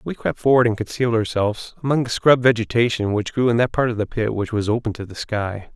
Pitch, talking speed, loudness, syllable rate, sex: 115 Hz, 250 wpm, -20 LUFS, 6.1 syllables/s, male